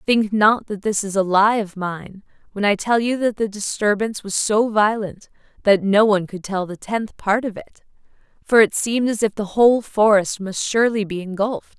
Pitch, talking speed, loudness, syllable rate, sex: 210 Hz, 210 wpm, -19 LUFS, 5.2 syllables/s, female